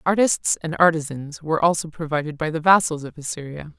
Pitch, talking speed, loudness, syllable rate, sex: 160 Hz, 175 wpm, -21 LUFS, 5.8 syllables/s, female